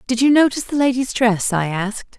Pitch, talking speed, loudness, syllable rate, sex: 240 Hz, 220 wpm, -18 LUFS, 5.9 syllables/s, female